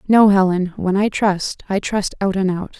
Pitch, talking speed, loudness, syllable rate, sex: 195 Hz, 215 wpm, -18 LUFS, 4.4 syllables/s, female